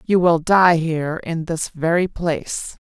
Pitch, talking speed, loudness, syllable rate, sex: 165 Hz, 165 wpm, -19 LUFS, 4.1 syllables/s, female